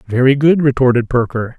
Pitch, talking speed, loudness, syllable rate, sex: 130 Hz, 150 wpm, -14 LUFS, 5.5 syllables/s, male